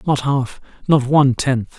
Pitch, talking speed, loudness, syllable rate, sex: 135 Hz, 135 wpm, -17 LUFS, 4.6 syllables/s, male